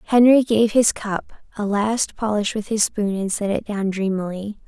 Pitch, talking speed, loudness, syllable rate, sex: 210 Hz, 195 wpm, -20 LUFS, 4.5 syllables/s, female